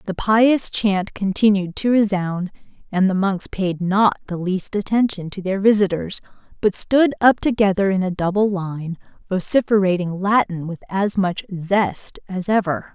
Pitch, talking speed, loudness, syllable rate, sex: 195 Hz, 155 wpm, -19 LUFS, 4.4 syllables/s, female